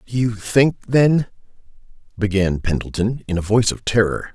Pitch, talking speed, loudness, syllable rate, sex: 110 Hz, 140 wpm, -19 LUFS, 4.7 syllables/s, male